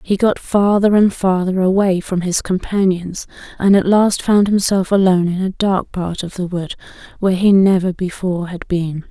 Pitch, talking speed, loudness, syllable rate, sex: 190 Hz, 185 wpm, -16 LUFS, 4.9 syllables/s, female